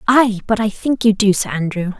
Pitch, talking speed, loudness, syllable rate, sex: 210 Hz, 240 wpm, -16 LUFS, 5.2 syllables/s, female